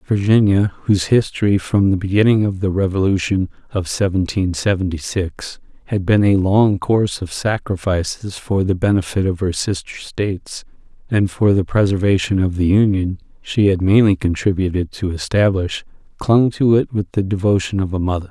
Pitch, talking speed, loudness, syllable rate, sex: 100 Hz, 160 wpm, -17 LUFS, 5.1 syllables/s, male